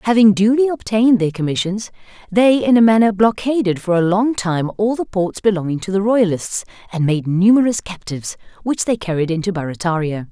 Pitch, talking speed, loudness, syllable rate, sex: 200 Hz, 175 wpm, -17 LUFS, 5.5 syllables/s, female